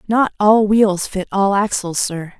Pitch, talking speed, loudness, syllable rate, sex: 200 Hz, 175 wpm, -16 LUFS, 3.9 syllables/s, female